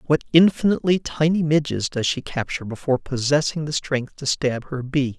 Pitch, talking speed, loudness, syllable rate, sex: 140 Hz, 175 wpm, -21 LUFS, 5.4 syllables/s, male